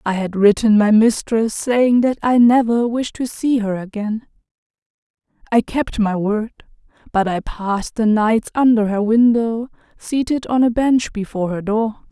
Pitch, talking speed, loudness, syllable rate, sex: 225 Hz, 165 wpm, -17 LUFS, 4.4 syllables/s, female